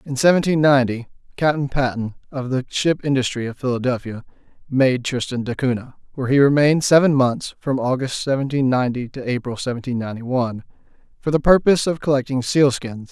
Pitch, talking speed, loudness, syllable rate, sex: 130 Hz, 155 wpm, -19 LUFS, 4.5 syllables/s, male